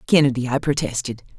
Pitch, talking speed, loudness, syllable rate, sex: 130 Hz, 130 wpm, -21 LUFS, 6.3 syllables/s, female